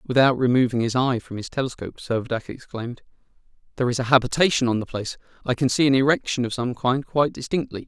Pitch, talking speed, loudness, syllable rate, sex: 125 Hz, 200 wpm, -22 LUFS, 6.8 syllables/s, male